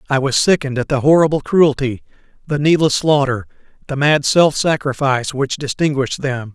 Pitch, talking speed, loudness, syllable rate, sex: 140 Hz, 155 wpm, -16 LUFS, 5.4 syllables/s, male